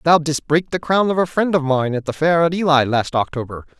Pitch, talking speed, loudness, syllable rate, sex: 155 Hz, 270 wpm, -18 LUFS, 5.6 syllables/s, male